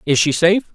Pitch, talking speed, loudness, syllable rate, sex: 170 Hz, 240 wpm, -15 LUFS, 6.4 syllables/s, male